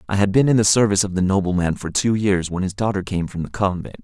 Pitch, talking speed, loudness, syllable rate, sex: 100 Hz, 280 wpm, -19 LUFS, 6.6 syllables/s, male